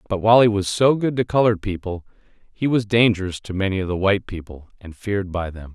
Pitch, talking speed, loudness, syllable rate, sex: 100 Hz, 230 wpm, -20 LUFS, 6.4 syllables/s, male